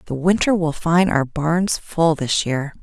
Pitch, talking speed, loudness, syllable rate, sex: 165 Hz, 190 wpm, -19 LUFS, 3.9 syllables/s, female